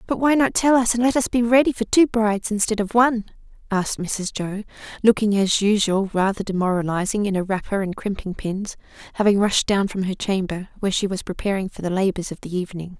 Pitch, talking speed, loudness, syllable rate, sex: 205 Hz, 210 wpm, -21 LUFS, 5.9 syllables/s, female